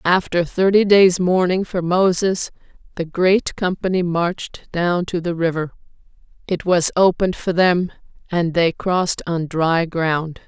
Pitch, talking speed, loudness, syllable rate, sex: 175 Hz, 145 wpm, -18 LUFS, 4.2 syllables/s, female